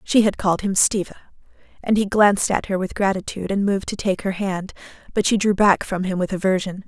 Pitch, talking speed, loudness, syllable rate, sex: 195 Hz, 225 wpm, -20 LUFS, 6.2 syllables/s, female